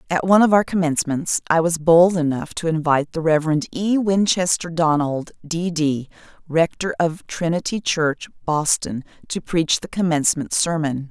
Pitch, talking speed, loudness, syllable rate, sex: 165 Hz, 150 wpm, -20 LUFS, 5.4 syllables/s, female